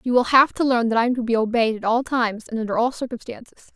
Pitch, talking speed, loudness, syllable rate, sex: 235 Hz, 285 wpm, -20 LUFS, 7.0 syllables/s, female